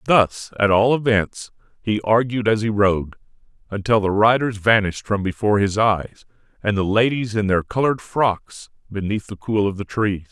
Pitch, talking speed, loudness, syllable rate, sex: 105 Hz, 175 wpm, -19 LUFS, 4.9 syllables/s, male